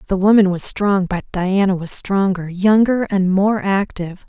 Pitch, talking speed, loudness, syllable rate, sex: 195 Hz, 170 wpm, -17 LUFS, 4.5 syllables/s, female